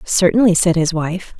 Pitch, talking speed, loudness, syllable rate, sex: 180 Hz, 170 wpm, -15 LUFS, 4.7 syllables/s, female